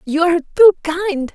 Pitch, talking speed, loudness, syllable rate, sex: 335 Hz, 180 wpm, -15 LUFS, 4.9 syllables/s, female